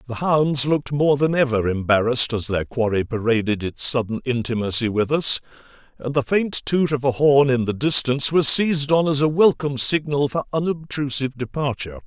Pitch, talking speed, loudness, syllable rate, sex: 135 Hz, 180 wpm, -20 LUFS, 5.5 syllables/s, male